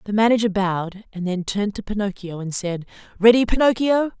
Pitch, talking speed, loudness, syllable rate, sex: 205 Hz, 170 wpm, -20 LUFS, 5.8 syllables/s, female